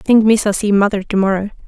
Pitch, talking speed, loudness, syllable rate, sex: 205 Hz, 215 wpm, -15 LUFS, 6.0 syllables/s, female